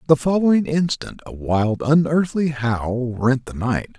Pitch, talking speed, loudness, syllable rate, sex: 135 Hz, 150 wpm, -20 LUFS, 4.1 syllables/s, male